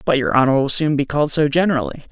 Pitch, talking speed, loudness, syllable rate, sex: 145 Hz, 255 wpm, -17 LUFS, 7.1 syllables/s, male